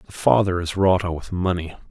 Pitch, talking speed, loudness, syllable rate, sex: 90 Hz, 190 wpm, -21 LUFS, 5.5 syllables/s, male